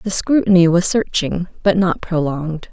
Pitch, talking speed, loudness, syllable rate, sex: 180 Hz, 155 wpm, -16 LUFS, 4.7 syllables/s, female